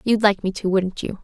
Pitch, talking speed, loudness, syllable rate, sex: 200 Hz, 290 wpm, -21 LUFS, 5.4 syllables/s, female